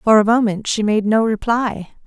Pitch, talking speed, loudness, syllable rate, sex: 220 Hz, 205 wpm, -17 LUFS, 4.8 syllables/s, female